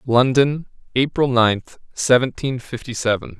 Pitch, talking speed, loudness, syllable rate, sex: 125 Hz, 105 wpm, -19 LUFS, 4.2 syllables/s, male